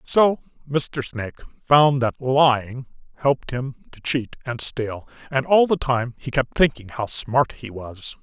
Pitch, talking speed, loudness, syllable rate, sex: 130 Hz, 170 wpm, -21 LUFS, 3.9 syllables/s, male